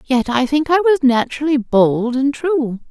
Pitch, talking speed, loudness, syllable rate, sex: 270 Hz, 185 wpm, -16 LUFS, 4.4 syllables/s, female